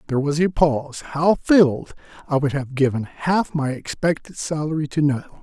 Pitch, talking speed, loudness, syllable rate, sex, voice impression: 150 Hz, 165 wpm, -21 LUFS, 4.9 syllables/s, male, masculine, slightly old, thick, slightly soft, sincere, reassuring, elegant, slightly kind